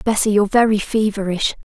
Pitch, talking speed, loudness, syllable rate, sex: 210 Hz, 140 wpm, -17 LUFS, 6.2 syllables/s, female